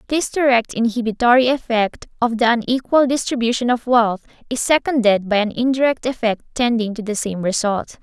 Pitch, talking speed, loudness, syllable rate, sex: 235 Hz, 155 wpm, -18 LUFS, 5.3 syllables/s, female